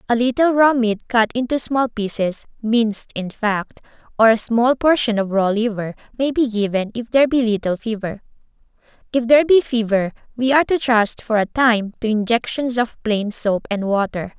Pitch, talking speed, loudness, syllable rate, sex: 230 Hz, 175 wpm, -18 LUFS, 4.9 syllables/s, female